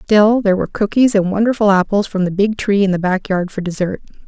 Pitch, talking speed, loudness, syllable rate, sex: 200 Hz, 240 wpm, -16 LUFS, 6.1 syllables/s, female